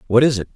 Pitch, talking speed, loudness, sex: 120 Hz, 325 wpm, -17 LUFS, male